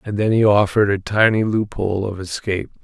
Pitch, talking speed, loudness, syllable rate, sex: 105 Hz, 190 wpm, -18 LUFS, 6.1 syllables/s, male